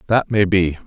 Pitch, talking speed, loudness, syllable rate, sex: 95 Hz, 210 wpm, -17 LUFS, 4.9 syllables/s, male